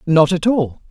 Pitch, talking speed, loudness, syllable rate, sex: 175 Hz, 200 wpm, -16 LUFS, 4.3 syllables/s, female